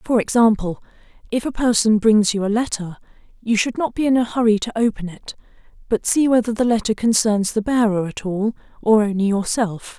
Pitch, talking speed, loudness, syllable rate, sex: 220 Hz, 190 wpm, -19 LUFS, 5.4 syllables/s, female